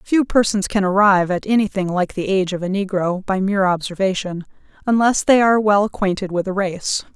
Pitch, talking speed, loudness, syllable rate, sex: 195 Hz, 195 wpm, -18 LUFS, 5.7 syllables/s, female